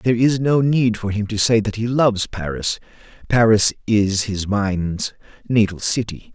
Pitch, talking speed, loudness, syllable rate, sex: 105 Hz, 170 wpm, -19 LUFS, 4.5 syllables/s, male